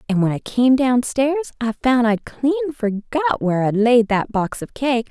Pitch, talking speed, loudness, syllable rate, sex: 240 Hz, 200 wpm, -19 LUFS, 4.3 syllables/s, female